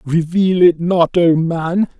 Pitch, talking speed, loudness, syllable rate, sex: 170 Hz, 150 wpm, -14 LUFS, 3.5 syllables/s, male